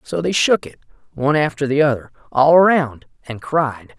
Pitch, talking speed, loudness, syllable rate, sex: 140 Hz, 180 wpm, -17 LUFS, 5.0 syllables/s, male